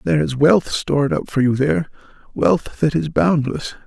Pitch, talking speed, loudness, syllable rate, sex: 130 Hz, 170 wpm, -18 LUFS, 5.0 syllables/s, male